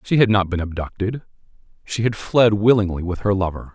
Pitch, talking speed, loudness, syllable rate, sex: 100 Hz, 175 wpm, -20 LUFS, 5.6 syllables/s, male